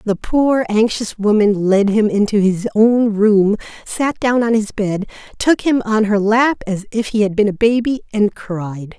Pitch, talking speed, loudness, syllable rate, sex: 215 Hz, 195 wpm, -16 LUFS, 4.1 syllables/s, female